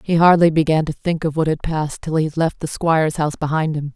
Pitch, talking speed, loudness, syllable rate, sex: 155 Hz, 275 wpm, -18 LUFS, 6.2 syllables/s, female